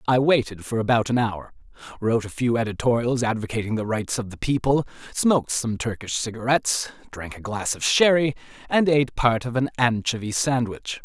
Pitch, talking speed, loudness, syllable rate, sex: 120 Hz, 175 wpm, -23 LUFS, 5.5 syllables/s, male